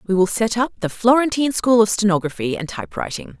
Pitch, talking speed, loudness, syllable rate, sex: 210 Hz, 195 wpm, -19 LUFS, 6.3 syllables/s, female